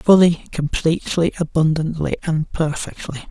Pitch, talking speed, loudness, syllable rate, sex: 160 Hz, 90 wpm, -19 LUFS, 4.5 syllables/s, male